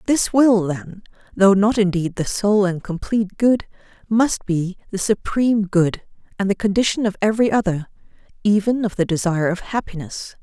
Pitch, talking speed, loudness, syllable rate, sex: 200 Hz, 160 wpm, -19 LUFS, 5.1 syllables/s, female